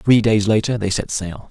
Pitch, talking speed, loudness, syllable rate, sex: 105 Hz, 240 wpm, -18 LUFS, 4.8 syllables/s, male